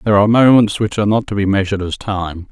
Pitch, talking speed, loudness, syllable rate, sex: 105 Hz, 265 wpm, -15 LUFS, 7.1 syllables/s, male